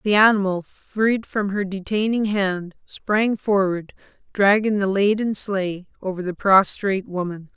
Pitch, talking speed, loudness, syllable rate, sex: 200 Hz, 135 wpm, -21 LUFS, 4.1 syllables/s, female